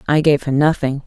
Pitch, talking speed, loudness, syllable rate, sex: 145 Hz, 225 wpm, -16 LUFS, 5.6 syllables/s, female